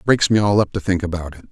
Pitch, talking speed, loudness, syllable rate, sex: 95 Hz, 355 wpm, -18 LUFS, 7.2 syllables/s, male